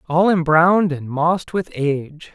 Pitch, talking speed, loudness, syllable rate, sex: 160 Hz, 155 wpm, -18 LUFS, 4.7 syllables/s, male